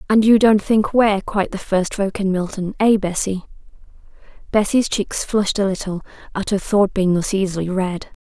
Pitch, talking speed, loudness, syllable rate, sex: 200 Hz, 180 wpm, -18 LUFS, 5.2 syllables/s, female